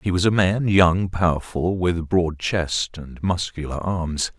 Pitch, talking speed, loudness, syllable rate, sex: 90 Hz, 165 wpm, -22 LUFS, 3.7 syllables/s, male